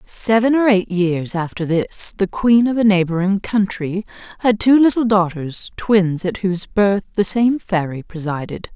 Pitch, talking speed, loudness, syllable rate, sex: 200 Hz, 165 wpm, -17 LUFS, 4.4 syllables/s, female